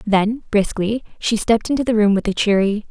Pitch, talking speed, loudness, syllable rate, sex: 215 Hz, 205 wpm, -18 LUFS, 5.5 syllables/s, female